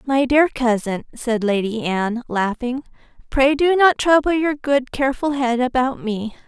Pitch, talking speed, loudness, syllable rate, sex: 255 Hz, 160 wpm, -19 LUFS, 4.5 syllables/s, female